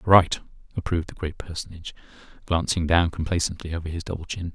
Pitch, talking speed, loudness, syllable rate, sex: 85 Hz, 170 wpm, -26 LUFS, 6.7 syllables/s, male